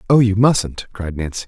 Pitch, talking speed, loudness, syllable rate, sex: 105 Hz, 205 wpm, -17 LUFS, 4.9 syllables/s, male